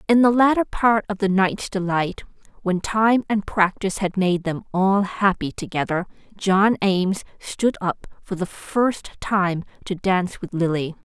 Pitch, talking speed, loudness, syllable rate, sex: 195 Hz, 160 wpm, -21 LUFS, 4.2 syllables/s, female